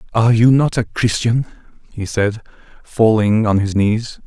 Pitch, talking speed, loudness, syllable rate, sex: 110 Hz, 155 wpm, -16 LUFS, 4.6 syllables/s, male